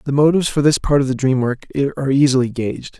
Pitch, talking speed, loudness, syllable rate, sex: 135 Hz, 240 wpm, -17 LUFS, 7.1 syllables/s, male